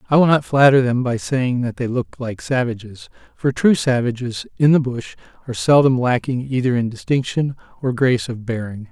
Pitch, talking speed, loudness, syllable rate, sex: 125 Hz, 190 wpm, -18 LUFS, 5.4 syllables/s, male